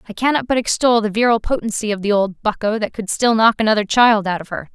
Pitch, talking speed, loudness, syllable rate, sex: 220 Hz, 255 wpm, -17 LUFS, 6.4 syllables/s, female